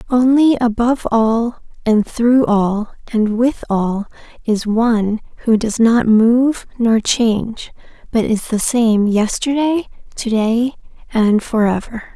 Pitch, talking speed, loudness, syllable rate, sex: 230 Hz, 135 wpm, -16 LUFS, 3.7 syllables/s, female